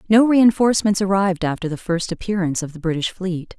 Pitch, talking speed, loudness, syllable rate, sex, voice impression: 190 Hz, 185 wpm, -19 LUFS, 6.2 syllables/s, female, very feminine, adult-like, slightly intellectual, slightly elegant